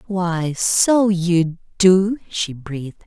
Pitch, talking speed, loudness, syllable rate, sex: 180 Hz, 60 wpm, -18 LUFS, 2.8 syllables/s, female